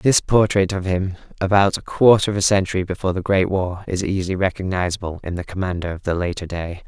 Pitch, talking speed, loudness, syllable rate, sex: 95 Hz, 210 wpm, -20 LUFS, 6.1 syllables/s, male